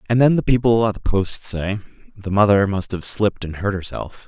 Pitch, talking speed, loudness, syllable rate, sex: 105 Hz, 225 wpm, -19 LUFS, 5.5 syllables/s, male